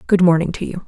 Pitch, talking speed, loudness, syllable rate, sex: 175 Hz, 275 wpm, -17 LUFS, 6.9 syllables/s, female